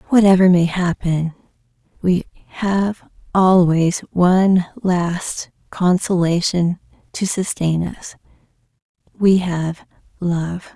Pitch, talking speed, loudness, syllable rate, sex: 175 Hz, 80 wpm, -18 LUFS, 3.4 syllables/s, female